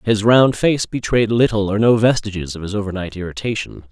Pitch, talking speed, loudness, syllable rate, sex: 110 Hz, 185 wpm, -17 LUFS, 5.5 syllables/s, male